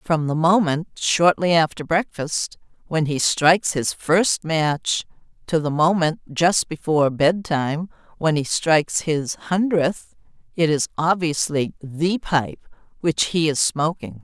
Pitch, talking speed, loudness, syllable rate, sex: 160 Hz, 140 wpm, -20 LUFS, 3.8 syllables/s, female